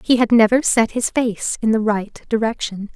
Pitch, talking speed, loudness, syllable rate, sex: 225 Hz, 205 wpm, -18 LUFS, 4.7 syllables/s, female